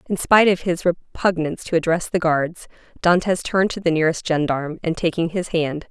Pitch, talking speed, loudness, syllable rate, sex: 170 Hz, 195 wpm, -20 LUFS, 5.8 syllables/s, female